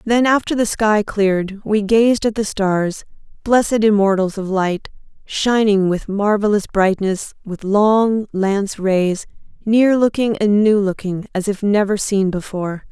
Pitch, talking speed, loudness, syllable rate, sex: 205 Hz, 150 wpm, -17 LUFS, 4.2 syllables/s, female